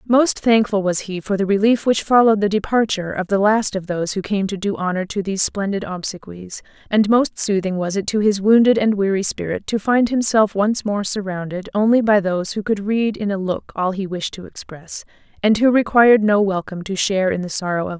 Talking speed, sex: 235 wpm, female